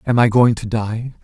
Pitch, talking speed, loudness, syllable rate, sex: 115 Hz, 245 wpm, -17 LUFS, 4.8 syllables/s, male